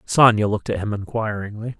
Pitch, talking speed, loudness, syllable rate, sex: 105 Hz, 165 wpm, -21 LUFS, 5.9 syllables/s, male